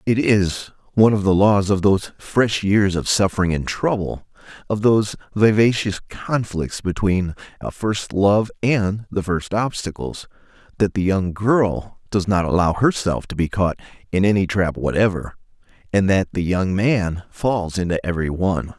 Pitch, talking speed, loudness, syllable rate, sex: 100 Hz, 160 wpm, -20 LUFS, 4.6 syllables/s, male